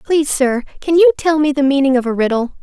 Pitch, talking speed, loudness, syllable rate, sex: 280 Hz, 250 wpm, -14 LUFS, 6.4 syllables/s, female